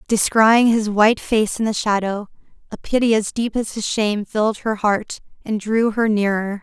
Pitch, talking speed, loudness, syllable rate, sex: 215 Hz, 190 wpm, -18 LUFS, 4.9 syllables/s, female